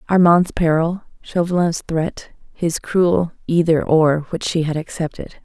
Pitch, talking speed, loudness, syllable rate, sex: 165 Hz, 120 wpm, -18 LUFS, 4.1 syllables/s, female